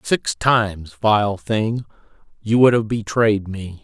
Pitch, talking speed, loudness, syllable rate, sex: 110 Hz, 140 wpm, -19 LUFS, 3.5 syllables/s, male